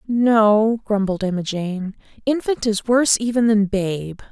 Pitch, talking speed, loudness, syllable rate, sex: 215 Hz, 140 wpm, -19 LUFS, 4.0 syllables/s, female